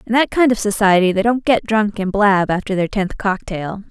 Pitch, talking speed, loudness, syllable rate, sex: 205 Hz, 230 wpm, -17 LUFS, 5.1 syllables/s, female